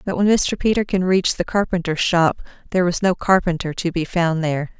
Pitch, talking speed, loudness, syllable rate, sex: 175 Hz, 200 wpm, -19 LUFS, 5.8 syllables/s, female